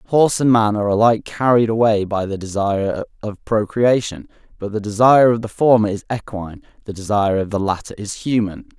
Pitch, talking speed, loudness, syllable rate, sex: 110 Hz, 185 wpm, -17 LUFS, 5.9 syllables/s, male